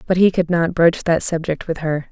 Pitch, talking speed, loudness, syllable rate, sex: 170 Hz, 255 wpm, -18 LUFS, 5.1 syllables/s, female